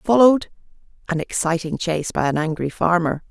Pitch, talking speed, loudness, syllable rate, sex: 170 Hz, 125 wpm, -20 LUFS, 5.8 syllables/s, female